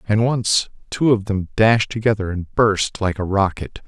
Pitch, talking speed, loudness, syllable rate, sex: 105 Hz, 185 wpm, -19 LUFS, 4.3 syllables/s, male